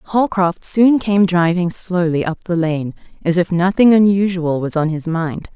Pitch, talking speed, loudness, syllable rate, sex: 180 Hz, 175 wpm, -16 LUFS, 4.2 syllables/s, female